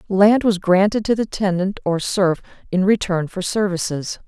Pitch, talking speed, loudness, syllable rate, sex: 190 Hz, 170 wpm, -19 LUFS, 4.6 syllables/s, female